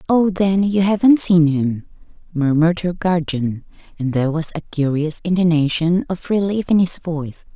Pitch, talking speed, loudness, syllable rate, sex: 170 Hz, 160 wpm, -18 LUFS, 4.8 syllables/s, female